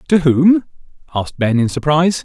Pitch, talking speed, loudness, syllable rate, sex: 155 Hz, 160 wpm, -15 LUFS, 5.7 syllables/s, male